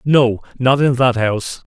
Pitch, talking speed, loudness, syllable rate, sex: 125 Hz, 175 wpm, -16 LUFS, 4.5 syllables/s, male